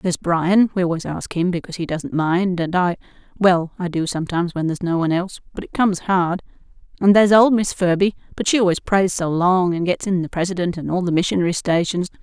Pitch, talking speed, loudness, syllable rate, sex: 180 Hz, 220 wpm, -19 LUFS, 6.2 syllables/s, female